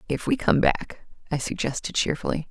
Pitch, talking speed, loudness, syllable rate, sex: 160 Hz, 165 wpm, -25 LUFS, 5.3 syllables/s, female